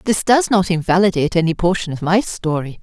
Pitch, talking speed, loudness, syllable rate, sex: 180 Hz, 190 wpm, -17 LUFS, 5.7 syllables/s, female